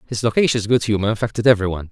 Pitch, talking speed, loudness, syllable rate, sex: 110 Hz, 190 wpm, -18 LUFS, 8.0 syllables/s, male